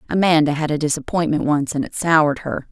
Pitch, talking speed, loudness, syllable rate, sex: 155 Hz, 200 wpm, -19 LUFS, 5.9 syllables/s, female